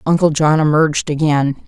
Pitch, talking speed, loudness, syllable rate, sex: 150 Hz, 145 wpm, -15 LUFS, 5.5 syllables/s, female